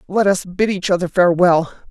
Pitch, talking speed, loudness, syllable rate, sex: 180 Hz, 190 wpm, -16 LUFS, 5.6 syllables/s, female